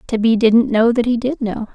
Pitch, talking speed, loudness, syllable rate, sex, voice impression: 235 Hz, 240 wpm, -16 LUFS, 5.1 syllables/s, female, very feminine, young, very thin, slightly tensed, slightly weak, very bright, soft, very clear, very fluent, very cute, intellectual, very refreshing, sincere, calm, very friendly, very reassuring, very unique, elegant, slightly wild, very sweet, very lively, kind, intense, slightly sharp, light